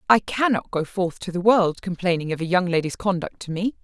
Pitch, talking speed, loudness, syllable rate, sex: 185 Hz, 235 wpm, -22 LUFS, 5.5 syllables/s, female